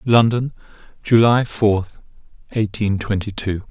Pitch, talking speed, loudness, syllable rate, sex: 110 Hz, 95 wpm, -19 LUFS, 3.9 syllables/s, male